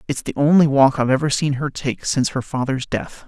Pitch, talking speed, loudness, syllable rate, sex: 140 Hz, 240 wpm, -19 LUFS, 5.9 syllables/s, male